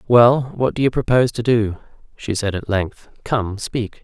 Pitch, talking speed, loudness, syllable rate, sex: 115 Hz, 195 wpm, -19 LUFS, 4.5 syllables/s, male